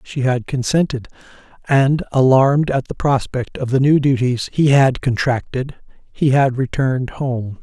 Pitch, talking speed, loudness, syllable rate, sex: 130 Hz, 150 wpm, -17 LUFS, 4.4 syllables/s, male